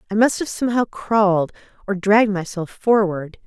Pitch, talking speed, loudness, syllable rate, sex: 205 Hz, 155 wpm, -19 LUFS, 5.4 syllables/s, female